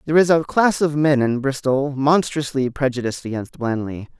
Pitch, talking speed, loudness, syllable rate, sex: 140 Hz, 170 wpm, -20 LUFS, 5.3 syllables/s, male